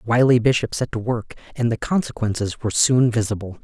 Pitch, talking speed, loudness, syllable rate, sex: 115 Hz, 200 wpm, -20 LUFS, 5.8 syllables/s, male